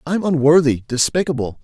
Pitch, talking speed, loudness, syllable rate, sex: 150 Hz, 110 wpm, -17 LUFS, 5.4 syllables/s, male